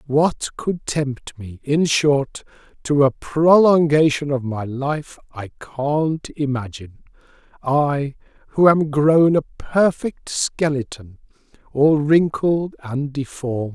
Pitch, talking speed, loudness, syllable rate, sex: 145 Hz, 115 wpm, -19 LUFS, 3.3 syllables/s, male